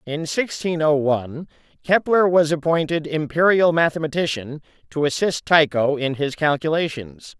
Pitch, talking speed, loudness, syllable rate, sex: 155 Hz, 120 wpm, -20 LUFS, 4.7 syllables/s, male